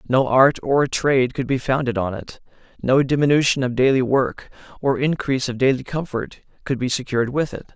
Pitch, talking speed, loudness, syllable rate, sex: 130 Hz, 185 wpm, -20 LUFS, 5.4 syllables/s, male